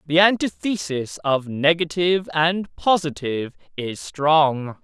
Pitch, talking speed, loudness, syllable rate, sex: 155 Hz, 100 wpm, -21 LUFS, 3.9 syllables/s, male